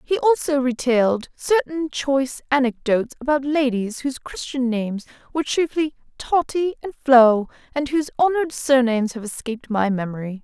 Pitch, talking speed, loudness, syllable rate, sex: 265 Hz, 140 wpm, -21 LUFS, 5.3 syllables/s, female